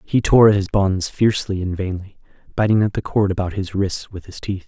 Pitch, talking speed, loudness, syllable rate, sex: 95 Hz, 220 wpm, -19 LUFS, 5.5 syllables/s, male